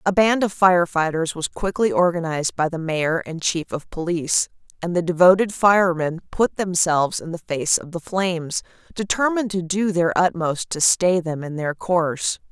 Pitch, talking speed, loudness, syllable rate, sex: 175 Hz, 180 wpm, -20 LUFS, 4.9 syllables/s, female